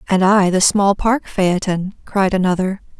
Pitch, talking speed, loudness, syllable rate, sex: 190 Hz, 160 wpm, -16 LUFS, 4.5 syllables/s, female